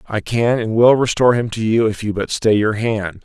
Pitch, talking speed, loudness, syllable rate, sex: 110 Hz, 260 wpm, -16 LUFS, 5.3 syllables/s, male